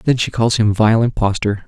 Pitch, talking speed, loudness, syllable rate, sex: 110 Hz, 215 wpm, -16 LUFS, 4.9 syllables/s, male